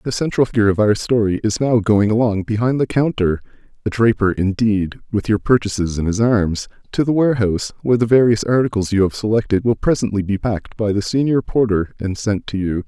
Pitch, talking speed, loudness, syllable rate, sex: 110 Hz, 205 wpm, -18 LUFS, 5.9 syllables/s, male